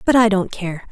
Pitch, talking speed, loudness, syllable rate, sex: 195 Hz, 260 wpm, -18 LUFS, 5.1 syllables/s, female